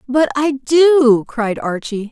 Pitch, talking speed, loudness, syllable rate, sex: 260 Hz, 140 wpm, -15 LUFS, 3.2 syllables/s, female